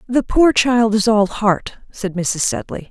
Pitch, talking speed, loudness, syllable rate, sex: 220 Hz, 185 wpm, -16 LUFS, 3.8 syllables/s, female